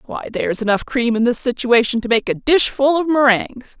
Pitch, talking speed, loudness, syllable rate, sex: 245 Hz, 205 wpm, -17 LUFS, 5.5 syllables/s, female